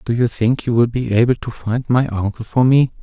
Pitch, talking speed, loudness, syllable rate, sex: 115 Hz, 260 wpm, -17 LUFS, 5.2 syllables/s, male